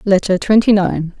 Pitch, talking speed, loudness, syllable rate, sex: 195 Hz, 150 wpm, -14 LUFS, 4.7 syllables/s, female